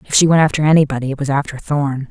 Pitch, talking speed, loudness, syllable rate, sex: 145 Hz, 255 wpm, -15 LUFS, 7.1 syllables/s, female